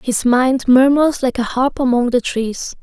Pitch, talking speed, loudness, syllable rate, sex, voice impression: 255 Hz, 190 wpm, -15 LUFS, 4.2 syllables/s, female, feminine, adult-like, slightly tensed, slightly powerful, bright, soft, slightly muffled, slightly raspy, friendly, slightly reassuring, elegant, lively, slightly modest